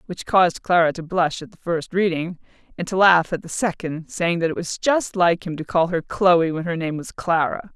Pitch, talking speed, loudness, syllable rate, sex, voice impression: 175 Hz, 240 wpm, -21 LUFS, 5.0 syllables/s, female, slightly masculine, slightly adult-like, refreshing, sincere